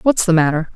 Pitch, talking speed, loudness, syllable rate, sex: 175 Hz, 235 wpm, -15 LUFS, 6.3 syllables/s, female